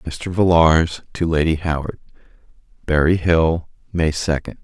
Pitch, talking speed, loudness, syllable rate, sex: 80 Hz, 115 wpm, -18 LUFS, 4.1 syllables/s, male